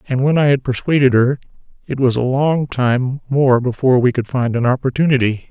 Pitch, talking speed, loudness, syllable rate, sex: 130 Hz, 195 wpm, -16 LUFS, 5.5 syllables/s, male